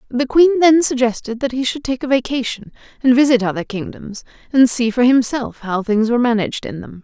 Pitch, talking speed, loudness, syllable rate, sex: 245 Hz, 205 wpm, -16 LUFS, 5.6 syllables/s, female